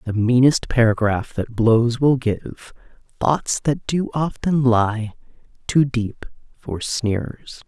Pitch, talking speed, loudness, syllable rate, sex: 120 Hz, 125 wpm, -20 LUFS, 3.2 syllables/s, female